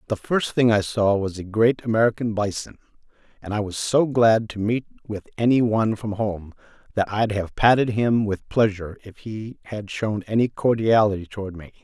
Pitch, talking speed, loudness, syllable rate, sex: 110 Hz, 190 wpm, -22 LUFS, 5.1 syllables/s, male